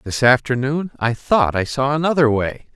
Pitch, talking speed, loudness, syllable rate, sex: 130 Hz, 175 wpm, -18 LUFS, 4.8 syllables/s, male